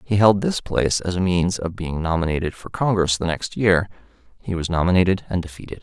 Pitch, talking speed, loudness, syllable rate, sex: 90 Hz, 205 wpm, -21 LUFS, 5.7 syllables/s, male